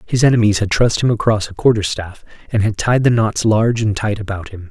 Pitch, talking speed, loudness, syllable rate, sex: 105 Hz, 240 wpm, -16 LUFS, 6.0 syllables/s, male